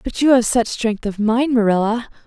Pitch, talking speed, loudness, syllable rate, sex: 230 Hz, 210 wpm, -17 LUFS, 5.0 syllables/s, female